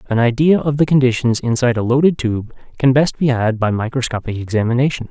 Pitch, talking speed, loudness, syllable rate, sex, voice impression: 125 Hz, 190 wpm, -16 LUFS, 6.1 syllables/s, male, very masculine, very adult-like, middle-aged, very thick, slightly relaxed, slightly powerful, slightly bright, slightly soft, slightly muffled, fluent, cool, very intellectual, refreshing, sincere, very calm, slightly mature, friendly, reassuring, slightly unique, elegant, slightly sweet, lively, kind, slightly modest